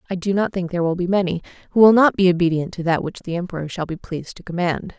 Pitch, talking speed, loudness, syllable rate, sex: 180 Hz, 275 wpm, -20 LUFS, 7.1 syllables/s, female